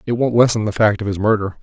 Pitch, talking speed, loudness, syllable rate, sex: 110 Hz, 295 wpm, -17 LUFS, 6.8 syllables/s, male